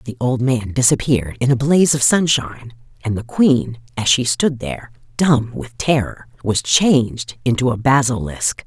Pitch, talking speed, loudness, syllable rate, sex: 125 Hz, 165 wpm, -17 LUFS, 4.8 syllables/s, female